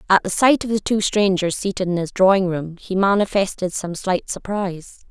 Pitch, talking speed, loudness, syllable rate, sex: 190 Hz, 200 wpm, -20 LUFS, 5.2 syllables/s, female